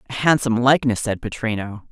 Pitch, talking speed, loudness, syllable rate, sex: 120 Hz, 155 wpm, -20 LUFS, 6.6 syllables/s, female